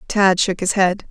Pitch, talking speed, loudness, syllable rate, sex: 190 Hz, 215 wpm, -17 LUFS, 4.2 syllables/s, female